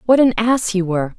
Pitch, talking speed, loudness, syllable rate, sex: 215 Hz, 255 wpm, -16 LUFS, 5.9 syllables/s, female